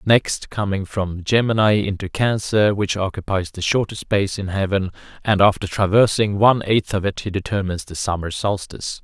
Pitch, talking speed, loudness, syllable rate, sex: 100 Hz, 165 wpm, -20 LUFS, 5.3 syllables/s, male